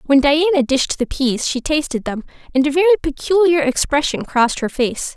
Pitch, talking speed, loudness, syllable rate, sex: 290 Hz, 185 wpm, -17 LUFS, 5.2 syllables/s, female